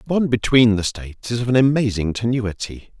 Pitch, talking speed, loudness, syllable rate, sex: 115 Hz, 200 wpm, -19 LUFS, 5.8 syllables/s, male